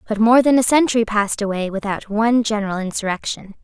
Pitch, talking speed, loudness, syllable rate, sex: 215 Hz, 180 wpm, -18 LUFS, 6.5 syllables/s, female